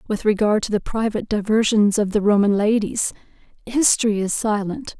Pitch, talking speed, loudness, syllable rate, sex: 215 Hz, 155 wpm, -19 LUFS, 5.4 syllables/s, female